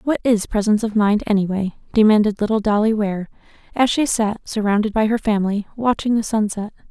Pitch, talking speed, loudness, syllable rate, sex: 215 Hz, 180 wpm, -19 LUFS, 5.8 syllables/s, female